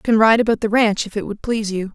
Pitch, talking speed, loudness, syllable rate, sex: 215 Hz, 340 wpm, -18 LUFS, 7.1 syllables/s, female